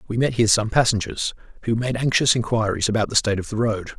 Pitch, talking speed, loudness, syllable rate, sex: 115 Hz, 225 wpm, -21 LUFS, 6.7 syllables/s, male